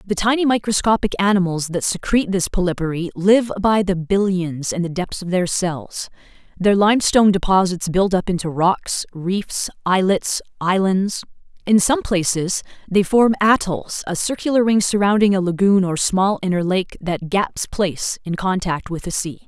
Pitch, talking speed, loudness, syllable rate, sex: 190 Hz, 160 wpm, -19 LUFS, 4.7 syllables/s, female